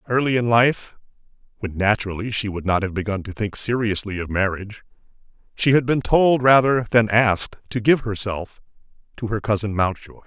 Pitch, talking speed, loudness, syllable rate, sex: 110 Hz, 170 wpm, -20 LUFS, 5.4 syllables/s, male